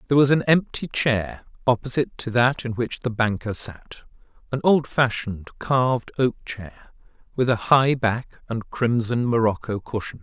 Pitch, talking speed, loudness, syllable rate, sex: 120 Hz, 155 wpm, -22 LUFS, 4.8 syllables/s, male